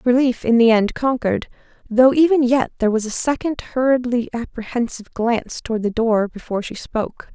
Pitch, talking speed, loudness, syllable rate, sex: 240 Hz, 170 wpm, -19 LUFS, 5.9 syllables/s, female